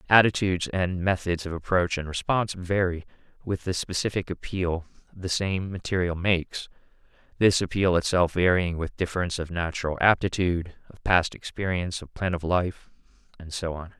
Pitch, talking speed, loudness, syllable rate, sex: 90 Hz, 150 wpm, -26 LUFS, 5.4 syllables/s, male